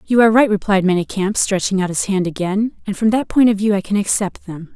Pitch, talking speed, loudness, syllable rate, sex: 200 Hz, 250 wpm, -17 LUFS, 6.0 syllables/s, female